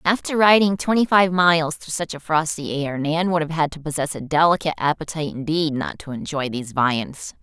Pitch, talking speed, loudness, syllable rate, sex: 160 Hz, 200 wpm, -20 LUFS, 5.6 syllables/s, female